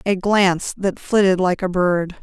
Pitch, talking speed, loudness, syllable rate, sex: 185 Hz, 190 wpm, -18 LUFS, 4.3 syllables/s, female